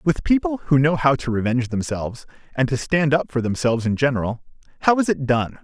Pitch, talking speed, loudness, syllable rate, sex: 140 Hz, 215 wpm, -21 LUFS, 5.9 syllables/s, male